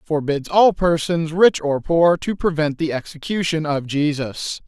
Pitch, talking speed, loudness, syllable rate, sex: 160 Hz, 155 wpm, -19 LUFS, 4.2 syllables/s, male